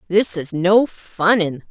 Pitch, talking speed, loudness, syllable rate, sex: 185 Hz, 140 wpm, -17 LUFS, 3.4 syllables/s, female